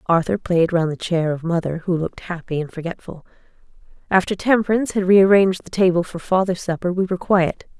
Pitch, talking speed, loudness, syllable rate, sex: 180 Hz, 185 wpm, -19 LUFS, 5.9 syllables/s, female